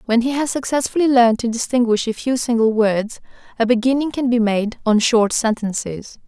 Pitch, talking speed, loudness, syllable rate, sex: 235 Hz, 180 wpm, -18 LUFS, 5.3 syllables/s, female